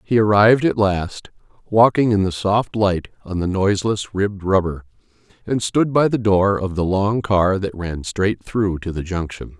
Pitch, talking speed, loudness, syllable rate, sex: 100 Hz, 190 wpm, -19 LUFS, 4.5 syllables/s, male